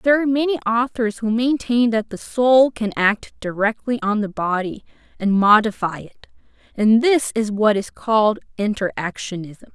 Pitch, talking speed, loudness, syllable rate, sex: 220 Hz, 160 wpm, -19 LUFS, 4.8 syllables/s, female